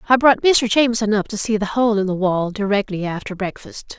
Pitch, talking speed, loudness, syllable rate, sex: 210 Hz, 225 wpm, -18 LUFS, 5.5 syllables/s, female